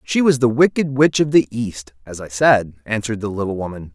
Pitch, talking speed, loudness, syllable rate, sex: 115 Hz, 230 wpm, -18 LUFS, 5.5 syllables/s, male